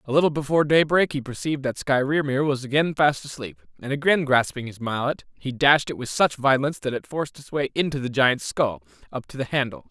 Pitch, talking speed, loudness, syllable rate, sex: 140 Hz, 220 wpm, -23 LUFS, 5.9 syllables/s, male